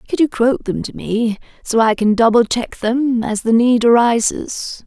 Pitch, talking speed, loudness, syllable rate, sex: 230 Hz, 195 wpm, -16 LUFS, 4.5 syllables/s, female